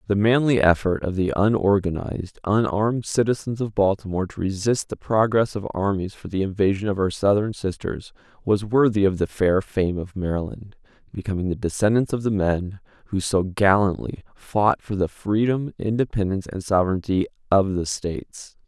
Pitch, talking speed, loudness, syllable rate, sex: 100 Hz, 160 wpm, -22 LUFS, 5.2 syllables/s, male